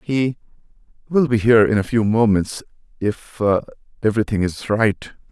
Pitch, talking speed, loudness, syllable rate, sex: 110 Hz, 115 wpm, -19 LUFS, 5.0 syllables/s, male